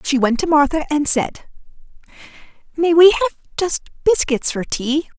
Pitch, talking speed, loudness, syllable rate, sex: 305 Hz, 150 wpm, -17 LUFS, 4.9 syllables/s, female